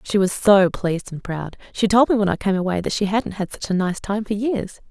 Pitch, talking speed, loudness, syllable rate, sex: 200 Hz, 280 wpm, -20 LUFS, 5.4 syllables/s, female